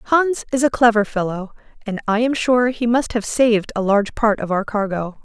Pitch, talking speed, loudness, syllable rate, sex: 225 Hz, 220 wpm, -18 LUFS, 5.1 syllables/s, female